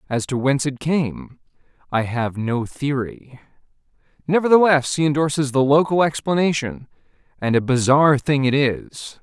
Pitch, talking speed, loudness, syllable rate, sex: 140 Hz, 130 wpm, -19 LUFS, 4.7 syllables/s, male